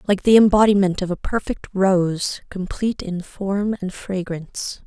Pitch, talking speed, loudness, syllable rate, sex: 195 Hz, 150 wpm, -20 LUFS, 4.4 syllables/s, female